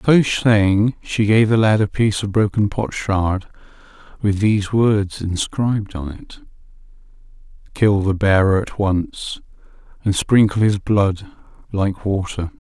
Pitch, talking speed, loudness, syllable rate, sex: 100 Hz, 135 wpm, -18 LUFS, 4.0 syllables/s, male